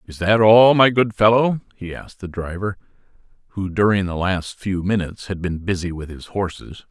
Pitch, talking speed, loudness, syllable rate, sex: 100 Hz, 190 wpm, -19 LUFS, 5.2 syllables/s, male